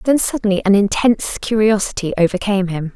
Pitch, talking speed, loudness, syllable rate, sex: 205 Hz, 140 wpm, -16 LUFS, 6.1 syllables/s, female